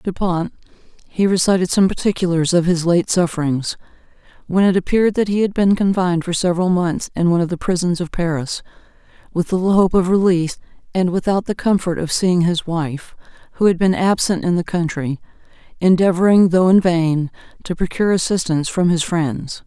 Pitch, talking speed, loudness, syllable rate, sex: 180 Hz, 175 wpm, -17 LUFS, 5.6 syllables/s, female